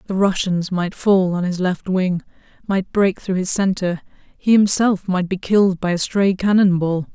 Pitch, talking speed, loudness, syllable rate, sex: 190 Hz, 195 wpm, -18 LUFS, 4.5 syllables/s, female